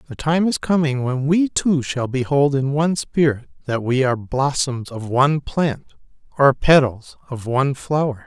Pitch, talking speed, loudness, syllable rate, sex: 140 Hz, 175 wpm, -19 LUFS, 4.7 syllables/s, male